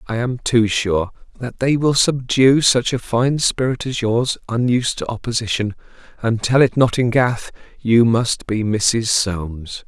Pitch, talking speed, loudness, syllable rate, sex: 120 Hz, 170 wpm, -18 LUFS, 4.1 syllables/s, male